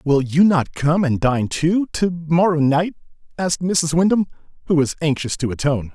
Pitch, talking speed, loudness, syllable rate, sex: 160 Hz, 180 wpm, -19 LUFS, 4.9 syllables/s, male